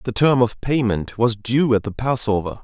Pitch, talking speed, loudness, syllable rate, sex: 115 Hz, 205 wpm, -19 LUFS, 4.8 syllables/s, male